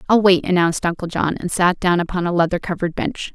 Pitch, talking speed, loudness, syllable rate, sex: 175 Hz, 235 wpm, -19 LUFS, 6.3 syllables/s, female